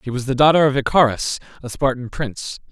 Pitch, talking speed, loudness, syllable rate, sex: 130 Hz, 200 wpm, -18 LUFS, 6.2 syllables/s, male